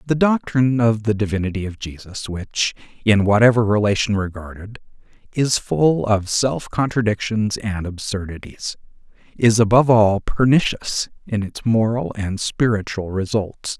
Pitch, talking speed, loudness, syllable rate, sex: 110 Hz, 125 wpm, -19 LUFS, 4.6 syllables/s, male